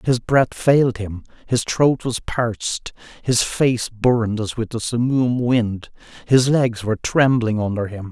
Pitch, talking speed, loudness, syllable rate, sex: 115 Hz, 170 wpm, -19 LUFS, 4.2 syllables/s, male